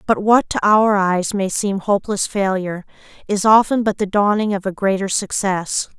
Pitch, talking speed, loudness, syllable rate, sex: 200 Hz, 180 wpm, -17 LUFS, 4.9 syllables/s, female